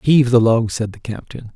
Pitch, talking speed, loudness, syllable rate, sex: 115 Hz, 230 wpm, -16 LUFS, 5.5 syllables/s, male